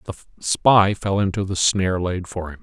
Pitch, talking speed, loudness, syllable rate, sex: 95 Hz, 205 wpm, -20 LUFS, 5.0 syllables/s, male